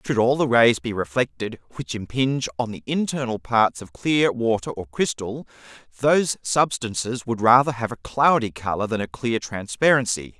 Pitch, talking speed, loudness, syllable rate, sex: 120 Hz, 165 wpm, -22 LUFS, 4.9 syllables/s, male